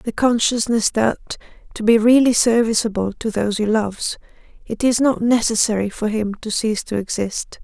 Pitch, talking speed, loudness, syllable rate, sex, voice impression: 220 Hz, 165 wpm, -18 LUFS, 5.2 syllables/s, female, very feminine, adult-like, middle-aged, thin, tensed, slightly weak, slightly dark, soft, clear, slightly raspy, slightly cute, intellectual, very refreshing, slightly sincere, calm, friendly, reassuring, slightly unique, elegant, sweet, slightly lively, very kind, very modest, light